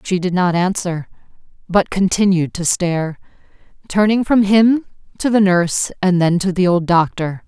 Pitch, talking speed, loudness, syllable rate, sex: 185 Hz, 160 wpm, -16 LUFS, 4.7 syllables/s, female